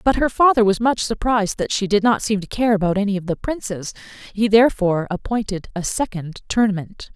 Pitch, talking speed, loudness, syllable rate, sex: 210 Hz, 200 wpm, -19 LUFS, 5.8 syllables/s, female